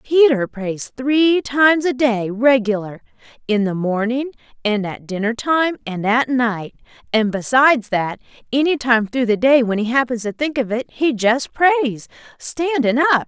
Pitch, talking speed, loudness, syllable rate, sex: 245 Hz, 160 wpm, -18 LUFS, 4.3 syllables/s, female